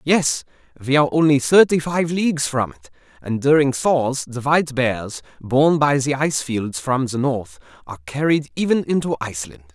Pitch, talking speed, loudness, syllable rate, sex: 135 Hz, 170 wpm, -19 LUFS, 5.3 syllables/s, male